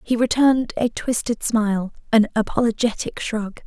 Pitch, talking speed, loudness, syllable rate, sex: 225 Hz, 130 wpm, -21 LUFS, 4.9 syllables/s, female